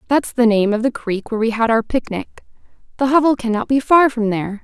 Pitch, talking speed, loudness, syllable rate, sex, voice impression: 235 Hz, 245 wpm, -17 LUFS, 5.9 syllables/s, female, feminine, adult-like, slightly relaxed, slightly bright, soft, clear, fluent, friendly, elegant, lively, slightly intense